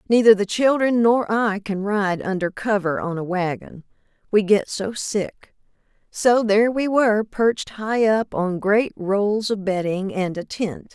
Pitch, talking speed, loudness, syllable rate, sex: 210 Hz, 170 wpm, -21 LUFS, 4.2 syllables/s, female